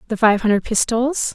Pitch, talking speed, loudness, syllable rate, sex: 230 Hz, 180 wpm, -18 LUFS, 6.1 syllables/s, female